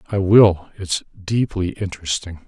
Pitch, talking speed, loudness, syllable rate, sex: 95 Hz, 95 wpm, -19 LUFS, 4.3 syllables/s, male